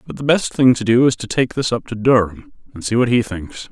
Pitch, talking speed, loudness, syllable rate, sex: 120 Hz, 290 wpm, -17 LUFS, 5.6 syllables/s, male